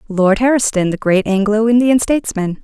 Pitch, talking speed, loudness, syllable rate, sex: 215 Hz, 160 wpm, -14 LUFS, 5.3 syllables/s, female